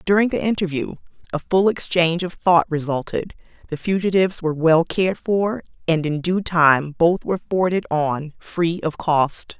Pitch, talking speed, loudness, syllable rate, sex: 170 Hz, 165 wpm, -20 LUFS, 5.0 syllables/s, female